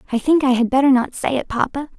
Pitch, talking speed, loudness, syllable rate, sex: 260 Hz, 270 wpm, -18 LUFS, 6.6 syllables/s, female